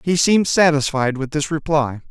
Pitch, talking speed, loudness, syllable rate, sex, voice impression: 150 Hz, 170 wpm, -18 LUFS, 5.2 syllables/s, male, masculine, slightly young, slightly adult-like, thick, tensed, slightly powerful, bright, slightly hard, clear, slightly fluent, cool, slightly intellectual, refreshing, sincere, very calm, slightly mature, slightly friendly, reassuring, wild, slightly sweet, very lively, kind